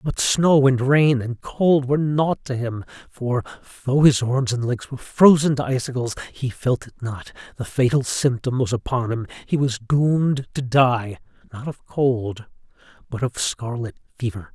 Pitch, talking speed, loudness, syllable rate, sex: 130 Hz, 170 wpm, -21 LUFS, 4.5 syllables/s, male